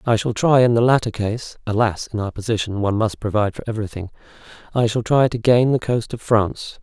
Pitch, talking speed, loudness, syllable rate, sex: 110 Hz, 220 wpm, -19 LUFS, 3.5 syllables/s, male